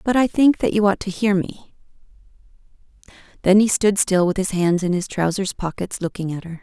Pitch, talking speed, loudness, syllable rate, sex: 190 Hz, 210 wpm, -19 LUFS, 5.4 syllables/s, female